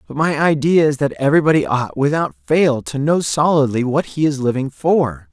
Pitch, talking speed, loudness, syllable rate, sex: 140 Hz, 190 wpm, -17 LUFS, 5.1 syllables/s, male